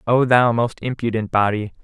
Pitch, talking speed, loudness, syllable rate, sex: 115 Hz, 165 wpm, -19 LUFS, 5.0 syllables/s, male